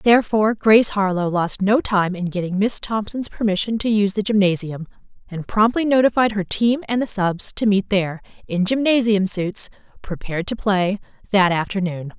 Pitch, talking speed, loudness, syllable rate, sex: 205 Hz, 165 wpm, -19 LUFS, 5.3 syllables/s, female